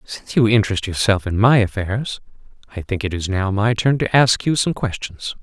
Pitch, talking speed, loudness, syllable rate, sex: 105 Hz, 210 wpm, -18 LUFS, 5.3 syllables/s, male